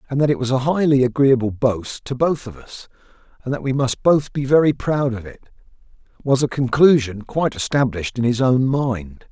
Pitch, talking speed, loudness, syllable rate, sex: 130 Hz, 200 wpm, -19 LUFS, 5.2 syllables/s, male